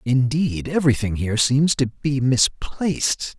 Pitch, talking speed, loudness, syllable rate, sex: 135 Hz, 125 wpm, -20 LUFS, 4.3 syllables/s, male